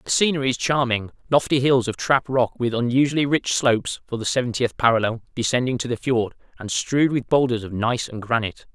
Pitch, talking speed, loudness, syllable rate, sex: 125 Hz, 200 wpm, -21 LUFS, 5.3 syllables/s, male